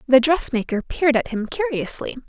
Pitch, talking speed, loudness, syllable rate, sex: 270 Hz, 160 wpm, -21 LUFS, 5.7 syllables/s, female